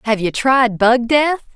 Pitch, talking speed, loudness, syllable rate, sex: 245 Hz, 195 wpm, -15 LUFS, 3.8 syllables/s, female